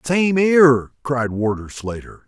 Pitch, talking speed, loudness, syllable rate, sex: 135 Hz, 130 wpm, -17 LUFS, 3.4 syllables/s, male